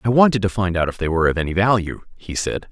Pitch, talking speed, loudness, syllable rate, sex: 95 Hz, 285 wpm, -19 LUFS, 6.9 syllables/s, male